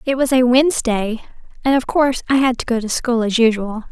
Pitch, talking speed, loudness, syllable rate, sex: 245 Hz, 230 wpm, -17 LUFS, 5.9 syllables/s, female